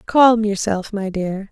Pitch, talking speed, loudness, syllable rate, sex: 205 Hz, 160 wpm, -18 LUFS, 3.6 syllables/s, female